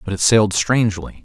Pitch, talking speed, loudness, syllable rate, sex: 105 Hz, 195 wpm, -16 LUFS, 6.3 syllables/s, male